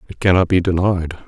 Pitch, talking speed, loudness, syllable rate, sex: 90 Hz, 190 wpm, -17 LUFS, 5.6 syllables/s, male